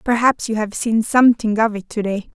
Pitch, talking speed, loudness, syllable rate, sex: 225 Hz, 225 wpm, -18 LUFS, 5.4 syllables/s, female